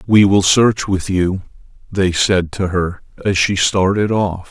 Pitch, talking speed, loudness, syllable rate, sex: 95 Hz, 175 wpm, -16 LUFS, 3.9 syllables/s, male